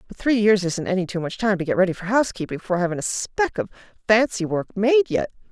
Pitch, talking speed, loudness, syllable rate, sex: 200 Hz, 250 wpm, -22 LUFS, 6.3 syllables/s, female